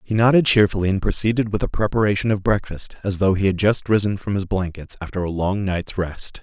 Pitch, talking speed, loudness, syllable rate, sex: 100 Hz, 225 wpm, -20 LUFS, 5.8 syllables/s, male